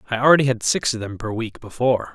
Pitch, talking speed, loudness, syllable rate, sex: 120 Hz, 250 wpm, -20 LUFS, 6.7 syllables/s, male